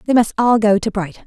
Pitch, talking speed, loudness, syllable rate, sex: 215 Hz, 285 wpm, -16 LUFS, 6.5 syllables/s, female